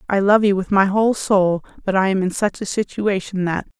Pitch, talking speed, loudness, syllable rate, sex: 195 Hz, 235 wpm, -19 LUFS, 5.4 syllables/s, female